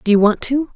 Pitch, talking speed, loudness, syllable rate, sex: 240 Hz, 320 wpm, -16 LUFS, 5.8 syllables/s, female